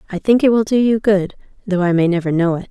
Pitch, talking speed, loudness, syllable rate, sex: 195 Hz, 290 wpm, -16 LUFS, 6.4 syllables/s, female